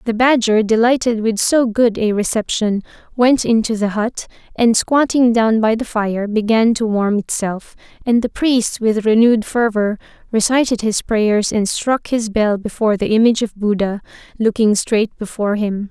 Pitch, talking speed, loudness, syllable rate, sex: 220 Hz, 165 wpm, -16 LUFS, 4.7 syllables/s, female